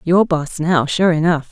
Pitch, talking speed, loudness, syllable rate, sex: 165 Hz, 200 wpm, -16 LUFS, 5.0 syllables/s, female